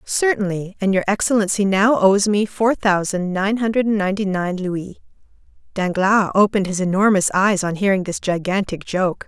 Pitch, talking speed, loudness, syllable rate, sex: 195 Hz, 155 wpm, -18 LUFS, 5.0 syllables/s, female